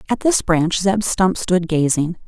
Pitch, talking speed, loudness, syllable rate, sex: 180 Hz, 185 wpm, -18 LUFS, 4.0 syllables/s, female